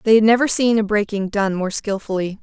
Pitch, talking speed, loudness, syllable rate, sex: 210 Hz, 225 wpm, -18 LUFS, 5.7 syllables/s, female